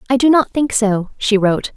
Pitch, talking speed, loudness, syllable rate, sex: 230 Hz, 240 wpm, -15 LUFS, 5.4 syllables/s, female